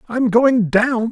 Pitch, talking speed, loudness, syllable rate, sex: 235 Hz, 215 wpm, -15 LUFS, 4.3 syllables/s, male